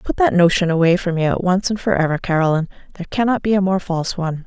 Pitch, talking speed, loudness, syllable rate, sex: 180 Hz, 255 wpm, -18 LUFS, 7.2 syllables/s, female